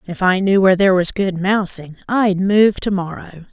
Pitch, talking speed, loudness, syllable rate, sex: 190 Hz, 205 wpm, -16 LUFS, 4.9 syllables/s, female